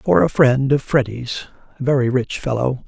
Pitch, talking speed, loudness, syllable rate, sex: 130 Hz, 165 wpm, -18 LUFS, 5.1 syllables/s, male